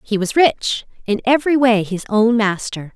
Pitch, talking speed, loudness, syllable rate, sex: 225 Hz, 185 wpm, -17 LUFS, 4.7 syllables/s, female